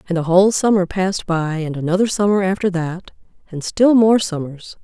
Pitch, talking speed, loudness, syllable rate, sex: 185 Hz, 185 wpm, -17 LUFS, 5.4 syllables/s, female